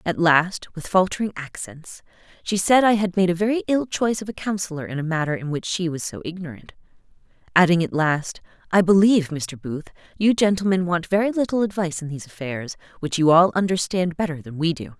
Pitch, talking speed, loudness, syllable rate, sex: 175 Hz, 195 wpm, -21 LUFS, 5.9 syllables/s, female